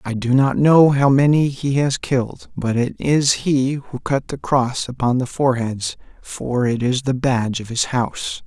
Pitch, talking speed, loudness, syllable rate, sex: 130 Hz, 200 wpm, -18 LUFS, 4.4 syllables/s, male